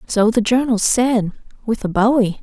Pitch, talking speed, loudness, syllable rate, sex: 225 Hz, 175 wpm, -17 LUFS, 4.6 syllables/s, female